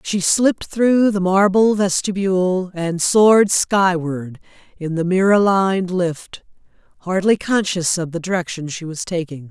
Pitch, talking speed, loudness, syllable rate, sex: 185 Hz, 140 wpm, -17 LUFS, 4.3 syllables/s, female